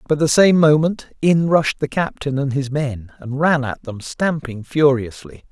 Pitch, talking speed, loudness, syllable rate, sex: 140 Hz, 185 wpm, -18 LUFS, 4.3 syllables/s, male